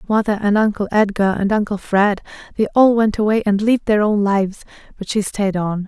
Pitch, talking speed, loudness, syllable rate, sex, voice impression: 205 Hz, 195 wpm, -17 LUFS, 5.5 syllables/s, female, feminine, adult-like, slightly cute, calm, friendly